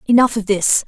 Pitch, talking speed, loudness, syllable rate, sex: 215 Hz, 205 wpm, -16 LUFS, 5.5 syllables/s, female